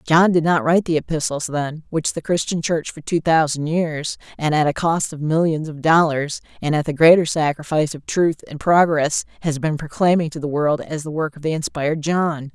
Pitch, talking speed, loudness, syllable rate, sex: 155 Hz, 215 wpm, -19 LUFS, 5.2 syllables/s, female